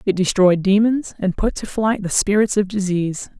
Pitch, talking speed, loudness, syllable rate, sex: 200 Hz, 195 wpm, -18 LUFS, 5.0 syllables/s, female